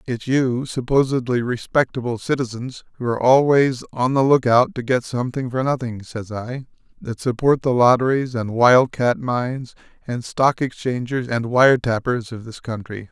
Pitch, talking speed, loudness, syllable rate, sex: 125 Hz, 160 wpm, -19 LUFS, 4.7 syllables/s, male